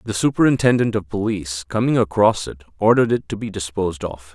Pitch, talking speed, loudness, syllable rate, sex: 100 Hz, 180 wpm, -19 LUFS, 6.2 syllables/s, male